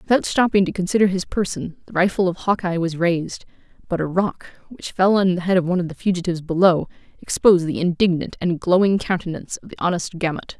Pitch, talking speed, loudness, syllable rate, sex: 180 Hz, 205 wpm, -20 LUFS, 6.4 syllables/s, female